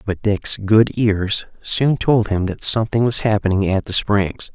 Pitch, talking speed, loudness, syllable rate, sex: 105 Hz, 185 wpm, -17 LUFS, 4.2 syllables/s, male